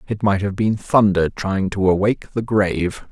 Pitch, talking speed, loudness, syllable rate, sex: 100 Hz, 195 wpm, -19 LUFS, 4.8 syllables/s, male